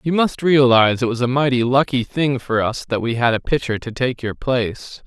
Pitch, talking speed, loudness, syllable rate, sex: 125 Hz, 235 wpm, -18 LUFS, 5.3 syllables/s, male